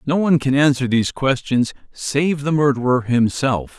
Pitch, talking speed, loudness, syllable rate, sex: 135 Hz, 160 wpm, -18 LUFS, 4.9 syllables/s, male